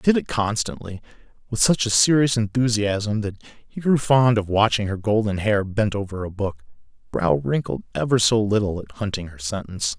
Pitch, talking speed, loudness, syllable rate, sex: 105 Hz, 185 wpm, -21 LUFS, 5.2 syllables/s, male